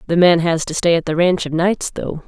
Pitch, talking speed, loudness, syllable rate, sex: 170 Hz, 290 wpm, -17 LUFS, 5.3 syllables/s, female